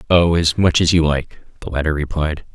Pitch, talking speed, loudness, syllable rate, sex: 80 Hz, 210 wpm, -17 LUFS, 5.3 syllables/s, male